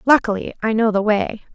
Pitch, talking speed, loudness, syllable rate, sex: 220 Hz, 195 wpm, -19 LUFS, 5.7 syllables/s, female